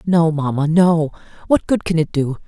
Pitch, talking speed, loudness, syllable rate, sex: 160 Hz, 195 wpm, -17 LUFS, 4.6 syllables/s, female